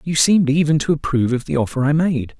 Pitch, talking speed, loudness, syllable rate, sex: 145 Hz, 250 wpm, -17 LUFS, 6.6 syllables/s, male